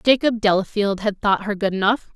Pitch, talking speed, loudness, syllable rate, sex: 205 Hz, 195 wpm, -20 LUFS, 5.4 syllables/s, female